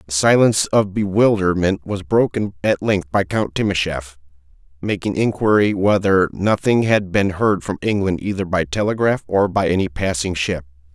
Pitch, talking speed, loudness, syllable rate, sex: 95 Hz, 155 wpm, -18 LUFS, 4.8 syllables/s, male